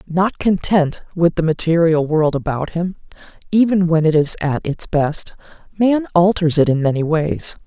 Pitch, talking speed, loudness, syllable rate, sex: 170 Hz, 165 wpm, -17 LUFS, 4.5 syllables/s, female